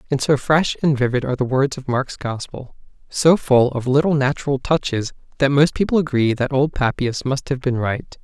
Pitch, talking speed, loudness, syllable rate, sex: 135 Hz, 205 wpm, -19 LUFS, 5.2 syllables/s, male